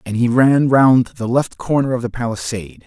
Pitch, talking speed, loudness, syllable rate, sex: 120 Hz, 210 wpm, -16 LUFS, 5.1 syllables/s, male